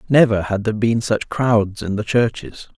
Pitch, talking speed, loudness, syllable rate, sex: 110 Hz, 195 wpm, -18 LUFS, 4.7 syllables/s, male